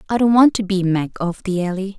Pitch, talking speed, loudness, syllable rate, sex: 195 Hz, 270 wpm, -18 LUFS, 5.6 syllables/s, female